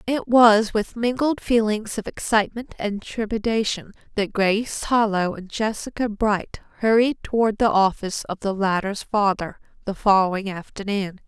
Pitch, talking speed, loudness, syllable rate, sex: 210 Hz, 140 wpm, -22 LUFS, 4.8 syllables/s, female